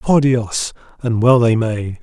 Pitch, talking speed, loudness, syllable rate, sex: 120 Hz, 175 wpm, -16 LUFS, 3.5 syllables/s, male